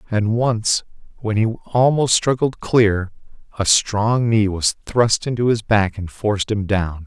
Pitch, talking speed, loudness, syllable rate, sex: 110 Hz, 160 wpm, -18 LUFS, 3.9 syllables/s, male